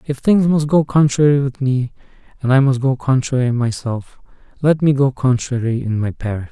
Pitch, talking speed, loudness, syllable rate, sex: 130 Hz, 185 wpm, -17 LUFS, 5.1 syllables/s, male